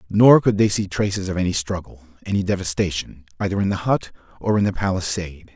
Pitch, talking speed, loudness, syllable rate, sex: 95 Hz, 195 wpm, -21 LUFS, 6.2 syllables/s, male